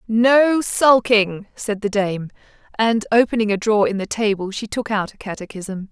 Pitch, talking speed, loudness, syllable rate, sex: 215 Hz, 175 wpm, -19 LUFS, 4.6 syllables/s, female